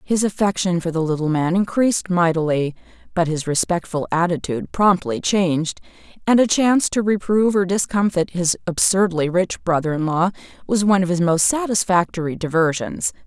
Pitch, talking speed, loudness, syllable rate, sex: 180 Hz, 155 wpm, -19 LUFS, 5.4 syllables/s, female